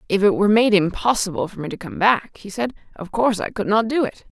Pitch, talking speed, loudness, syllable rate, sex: 210 Hz, 260 wpm, -20 LUFS, 6.2 syllables/s, female